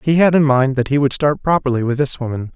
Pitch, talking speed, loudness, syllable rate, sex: 140 Hz, 280 wpm, -16 LUFS, 6.1 syllables/s, male